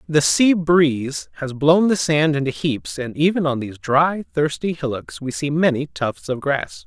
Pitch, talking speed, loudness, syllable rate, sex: 145 Hz, 190 wpm, -19 LUFS, 4.5 syllables/s, male